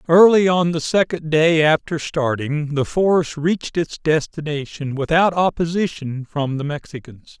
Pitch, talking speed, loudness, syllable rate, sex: 160 Hz, 140 wpm, -19 LUFS, 4.4 syllables/s, male